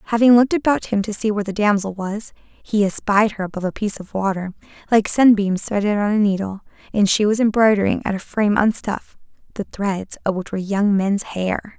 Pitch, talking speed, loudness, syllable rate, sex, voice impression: 205 Hz, 210 wpm, -19 LUFS, 5.8 syllables/s, female, feminine, adult-like, tensed, powerful, slightly soft, fluent, slightly raspy, intellectual, friendly, elegant, lively, slightly intense